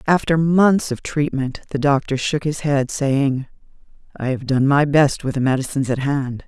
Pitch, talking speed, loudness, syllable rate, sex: 140 Hz, 185 wpm, -19 LUFS, 4.7 syllables/s, female